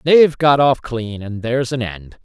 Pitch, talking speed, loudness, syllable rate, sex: 125 Hz, 215 wpm, -17 LUFS, 4.7 syllables/s, male